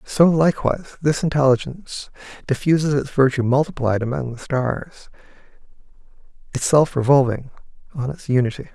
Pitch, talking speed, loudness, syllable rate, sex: 140 Hz, 110 wpm, -20 LUFS, 5.7 syllables/s, male